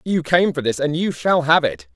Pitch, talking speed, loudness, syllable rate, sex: 150 Hz, 275 wpm, -18 LUFS, 4.9 syllables/s, male